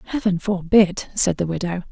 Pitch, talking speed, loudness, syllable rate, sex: 185 Hz, 155 wpm, -20 LUFS, 5.1 syllables/s, female